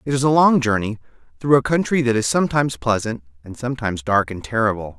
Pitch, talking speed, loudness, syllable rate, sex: 120 Hz, 205 wpm, -19 LUFS, 6.5 syllables/s, male